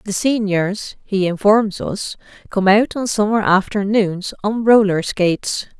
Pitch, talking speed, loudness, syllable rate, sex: 205 Hz, 135 wpm, -17 LUFS, 4.0 syllables/s, female